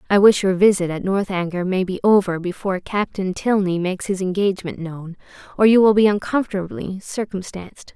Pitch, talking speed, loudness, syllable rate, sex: 190 Hz, 165 wpm, -19 LUFS, 5.6 syllables/s, female